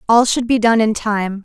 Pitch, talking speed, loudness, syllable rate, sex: 220 Hz, 250 wpm, -15 LUFS, 4.8 syllables/s, female